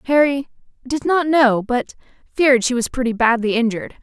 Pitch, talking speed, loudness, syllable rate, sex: 255 Hz, 165 wpm, -18 LUFS, 5.5 syllables/s, female